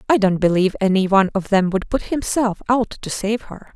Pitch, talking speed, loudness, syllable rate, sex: 205 Hz, 225 wpm, -19 LUFS, 5.5 syllables/s, female